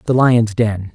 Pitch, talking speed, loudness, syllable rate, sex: 110 Hz, 190 wpm, -15 LUFS, 3.8 syllables/s, male